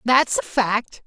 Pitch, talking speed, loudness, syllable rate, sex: 235 Hz, 170 wpm, -20 LUFS, 3.2 syllables/s, female